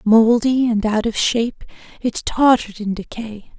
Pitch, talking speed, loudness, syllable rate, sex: 225 Hz, 150 wpm, -18 LUFS, 4.6 syllables/s, female